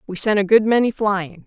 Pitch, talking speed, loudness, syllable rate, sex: 205 Hz, 245 wpm, -18 LUFS, 5.3 syllables/s, female